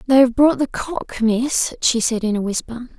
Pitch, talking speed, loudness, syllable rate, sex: 245 Hz, 220 wpm, -18 LUFS, 4.4 syllables/s, female